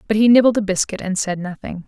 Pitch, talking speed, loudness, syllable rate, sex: 205 Hz, 255 wpm, -17 LUFS, 6.4 syllables/s, female